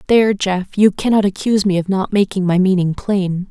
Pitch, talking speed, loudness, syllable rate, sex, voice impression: 195 Hz, 205 wpm, -16 LUFS, 5.5 syllables/s, female, feminine, adult-like, tensed, powerful, bright, clear, slightly raspy, calm, slightly friendly, elegant, lively, slightly kind, slightly modest